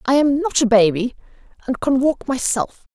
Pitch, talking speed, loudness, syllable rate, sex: 255 Hz, 185 wpm, -18 LUFS, 5.0 syllables/s, female